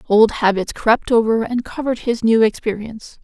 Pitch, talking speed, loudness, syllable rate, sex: 225 Hz, 165 wpm, -17 LUFS, 5.3 syllables/s, female